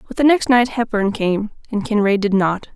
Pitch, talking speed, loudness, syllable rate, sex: 215 Hz, 220 wpm, -17 LUFS, 5.1 syllables/s, female